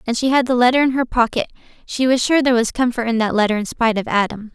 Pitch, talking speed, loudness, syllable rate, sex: 240 Hz, 275 wpm, -17 LUFS, 6.9 syllables/s, female